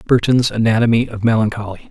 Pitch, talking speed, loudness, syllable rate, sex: 115 Hz, 125 wpm, -16 LUFS, 6.3 syllables/s, male